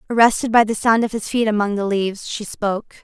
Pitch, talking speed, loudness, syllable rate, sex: 215 Hz, 235 wpm, -19 LUFS, 6.0 syllables/s, female